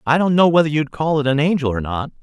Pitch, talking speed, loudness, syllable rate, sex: 145 Hz, 295 wpm, -17 LUFS, 6.4 syllables/s, male